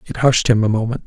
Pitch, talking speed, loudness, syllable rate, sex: 115 Hz, 280 wpm, -16 LUFS, 6.3 syllables/s, male